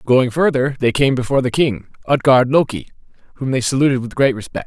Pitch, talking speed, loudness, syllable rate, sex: 130 Hz, 195 wpm, -16 LUFS, 6.1 syllables/s, male